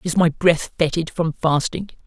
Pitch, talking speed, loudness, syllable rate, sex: 165 Hz, 175 wpm, -20 LUFS, 4.5 syllables/s, male